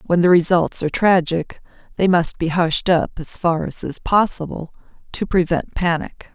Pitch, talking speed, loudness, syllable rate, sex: 170 Hz, 170 wpm, -18 LUFS, 4.6 syllables/s, female